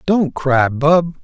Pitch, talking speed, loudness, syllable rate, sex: 150 Hz, 145 wpm, -15 LUFS, 2.8 syllables/s, male